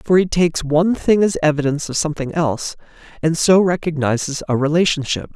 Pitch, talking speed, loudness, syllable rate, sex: 160 Hz, 170 wpm, -17 LUFS, 6.2 syllables/s, male